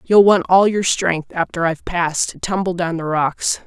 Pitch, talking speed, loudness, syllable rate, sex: 175 Hz, 215 wpm, -17 LUFS, 4.8 syllables/s, female